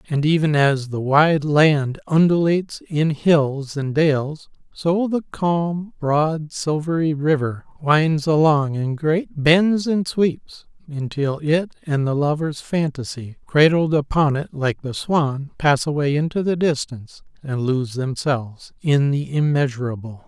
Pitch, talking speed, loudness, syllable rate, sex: 150 Hz, 140 wpm, -20 LUFS, 3.8 syllables/s, male